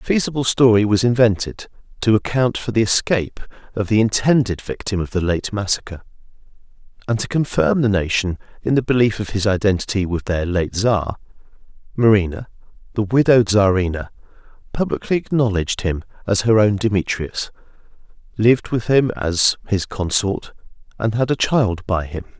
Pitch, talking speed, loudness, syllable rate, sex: 105 Hz, 150 wpm, -18 LUFS, 5.3 syllables/s, male